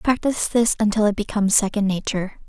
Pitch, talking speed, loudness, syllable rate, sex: 210 Hz, 170 wpm, -20 LUFS, 6.4 syllables/s, female